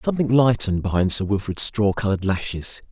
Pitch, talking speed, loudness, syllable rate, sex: 105 Hz, 165 wpm, -20 LUFS, 6.2 syllables/s, male